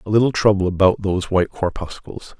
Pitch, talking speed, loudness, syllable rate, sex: 100 Hz, 175 wpm, -18 LUFS, 6.2 syllables/s, male